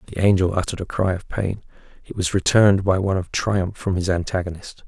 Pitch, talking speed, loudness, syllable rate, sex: 95 Hz, 210 wpm, -21 LUFS, 6.1 syllables/s, male